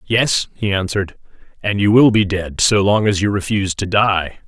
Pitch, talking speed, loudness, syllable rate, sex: 100 Hz, 200 wpm, -16 LUFS, 5.0 syllables/s, male